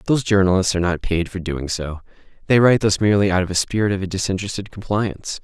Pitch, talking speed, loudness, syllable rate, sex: 95 Hz, 210 wpm, -19 LUFS, 7.1 syllables/s, male